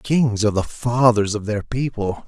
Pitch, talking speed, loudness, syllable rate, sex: 115 Hz, 185 wpm, -20 LUFS, 4.5 syllables/s, male